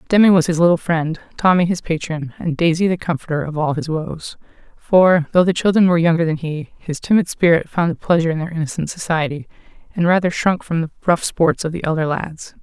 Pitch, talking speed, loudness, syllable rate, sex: 165 Hz, 215 wpm, -18 LUFS, 5.9 syllables/s, female